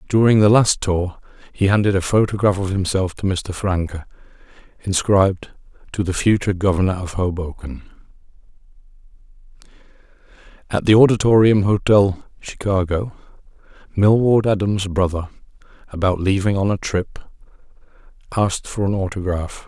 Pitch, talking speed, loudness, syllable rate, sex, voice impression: 95 Hz, 115 wpm, -18 LUFS, 5.2 syllables/s, male, very masculine, very adult-like, slightly old, very thick, slightly relaxed, slightly powerful, slightly weak, dark, slightly soft, muffled, slightly fluent, slightly raspy, very cool, intellectual, sincere, very calm, very mature, friendly, very reassuring, very unique, elegant, very wild, slightly sweet, kind, modest